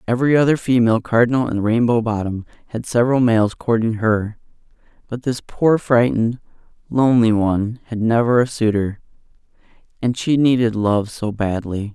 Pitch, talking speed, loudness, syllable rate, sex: 115 Hz, 140 wpm, -18 LUFS, 5.3 syllables/s, male